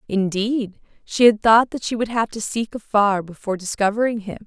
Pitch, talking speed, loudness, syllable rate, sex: 215 Hz, 190 wpm, -20 LUFS, 5.2 syllables/s, female